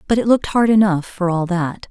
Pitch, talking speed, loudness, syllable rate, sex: 190 Hz, 250 wpm, -17 LUFS, 5.8 syllables/s, female